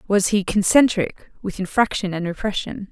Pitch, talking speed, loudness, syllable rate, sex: 195 Hz, 145 wpm, -20 LUFS, 4.9 syllables/s, female